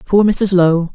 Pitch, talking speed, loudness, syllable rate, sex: 185 Hz, 190 wpm, -13 LUFS, 3.8 syllables/s, female